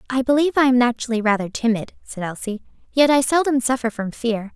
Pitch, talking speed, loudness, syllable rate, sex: 245 Hz, 195 wpm, -20 LUFS, 6.3 syllables/s, female